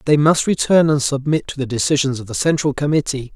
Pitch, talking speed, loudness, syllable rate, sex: 140 Hz, 215 wpm, -17 LUFS, 5.9 syllables/s, male